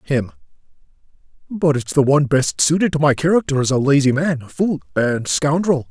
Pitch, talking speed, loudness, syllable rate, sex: 145 Hz, 175 wpm, -17 LUFS, 5.2 syllables/s, male